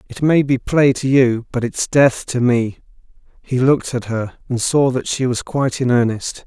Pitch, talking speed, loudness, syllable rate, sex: 125 Hz, 215 wpm, -17 LUFS, 4.7 syllables/s, male